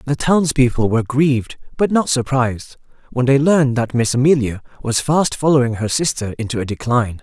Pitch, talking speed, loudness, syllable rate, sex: 130 Hz, 175 wpm, -17 LUFS, 5.6 syllables/s, male